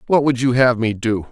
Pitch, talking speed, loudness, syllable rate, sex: 125 Hz, 275 wpm, -17 LUFS, 5.3 syllables/s, male